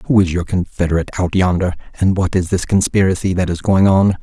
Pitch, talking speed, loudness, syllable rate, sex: 90 Hz, 215 wpm, -16 LUFS, 6.0 syllables/s, male